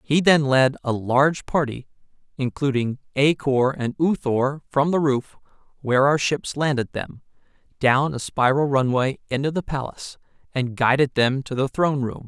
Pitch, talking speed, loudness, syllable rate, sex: 135 Hz, 165 wpm, -22 LUFS, 4.8 syllables/s, male